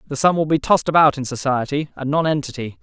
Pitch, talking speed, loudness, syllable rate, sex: 145 Hz, 210 wpm, -19 LUFS, 6.6 syllables/s, male